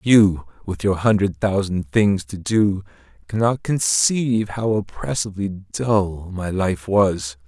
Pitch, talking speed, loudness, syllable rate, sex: 100 Hz, 130 wpm, -20 LUFS, 3.7 syllables/s, male